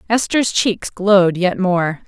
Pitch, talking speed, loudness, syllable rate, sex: 195 Hz, 145 wpm, -16 LUFS, 3.9 syllables/s, female